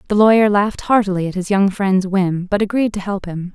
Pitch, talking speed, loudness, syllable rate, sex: 195 Hz, 235 wpm, -17 LUFS, 5.7 syllables/s, female